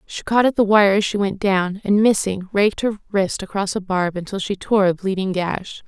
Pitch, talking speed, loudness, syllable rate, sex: 195 Hz, 235 wpm, -19 LUFS, 5.2 syllables/s, female